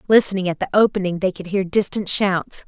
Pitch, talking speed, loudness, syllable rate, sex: 190 Hz, 200 wpm, -19 LUFS, 5.7 syllables/s, female